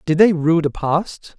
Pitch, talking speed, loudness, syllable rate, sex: 165 Hz, 215 wpm, -17 LUFS, 3.9 syllables/s, male